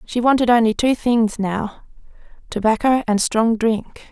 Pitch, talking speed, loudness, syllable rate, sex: 230 Hz, 130 wpm, -18 LUFS, 4.3 syllables/s, female